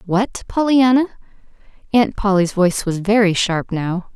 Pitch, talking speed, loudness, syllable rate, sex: 205 Hz, 130 wpm, -17 LUFS, 4.5 syllables/s, female